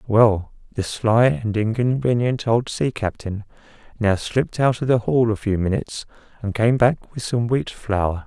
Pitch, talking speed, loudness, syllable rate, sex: 110 Hz, 175 wpm, -21 LUFS, 4.4 syllables/s, male